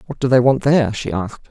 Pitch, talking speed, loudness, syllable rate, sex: 125 Hz, 280 wpm, -17 LUFS, 6.8 syllables/s, male